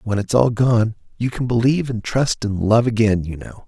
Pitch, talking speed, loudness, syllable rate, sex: 115 Hz, 230 wpm, -19 LUFS, 5.1 syllables/s, male